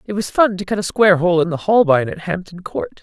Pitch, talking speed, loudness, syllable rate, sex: 185 Hz, 280 wpm, -17 LUFS, 5.8 syllables/s, female